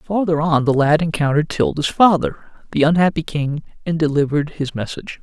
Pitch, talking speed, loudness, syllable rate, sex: 150 Hz, 160 wpm, -18 LUFS, 5.9 syllables/s, male